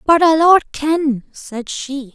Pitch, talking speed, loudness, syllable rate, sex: 290 Hz, 170 wpm, -15 LUFS, 3.2 syllables/s, female